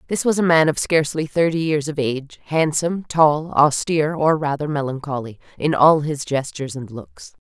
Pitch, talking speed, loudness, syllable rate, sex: 150 Hz, 175 wpm, -19 LUFS, 5.3 syllables/s, female